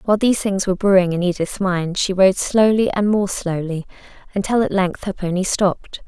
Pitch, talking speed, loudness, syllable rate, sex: 190 Hz, 200 wpm, -18 LUFS, 5.5 syllables/s, female